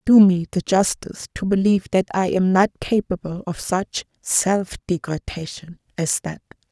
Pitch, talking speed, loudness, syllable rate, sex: 185 Hz, 150 wpm, -21 LUFS, 4.7 syllables/s, female